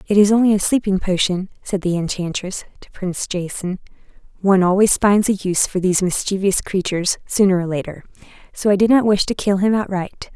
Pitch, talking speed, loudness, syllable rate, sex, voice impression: 190 Hz, 190 wpm, -18 LUFS, 5.9 syllables/s, female, very feminine, slightly young, slightly adult-like, very thin, slightly tensed, slightly powerful, slightly bright, hard, very clear, very fluent, cute, slightly cool, very intellectual, very refreshing, sincere, very calm, friendly, reassuring, unique, elegant, very sweet, slightly strict, slightly sharp